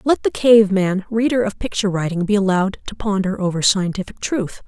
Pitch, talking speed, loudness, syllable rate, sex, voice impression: 200 Hz, 190 wpm, -18 LUFS, 5.6 syllables/s, female, feminine, adult-like, slightly clear, slightly intellectual, slightly calm, elegant